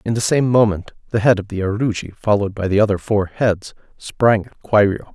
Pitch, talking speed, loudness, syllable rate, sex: 105 Hz, 210 wpm, -18 LUFS, 5.6 syllables/s, male